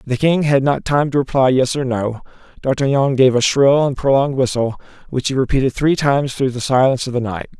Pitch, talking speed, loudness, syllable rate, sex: 135 Hz, 220 wpm, -16 LUFS, 5.8 syllables/s, male